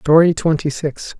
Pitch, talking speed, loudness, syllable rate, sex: 155 Hz, 150 wpm, -17 LUFS, 4.4 syllables/s, male